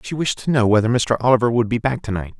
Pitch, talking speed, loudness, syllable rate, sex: 115 Hz, 300 wpm, -18 LUFS, 6.8 syllables/s, male